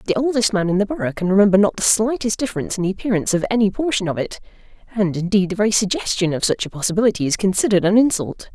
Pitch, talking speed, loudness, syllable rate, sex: 200 Hz, 230 wpm, -18 LUFS, 7.6 syllables/s, female